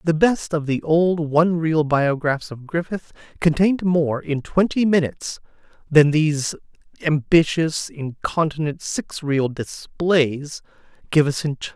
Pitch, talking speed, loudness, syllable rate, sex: 155 Hz, 140 wpm, -20 LUFS, 4.3 syllables/s, male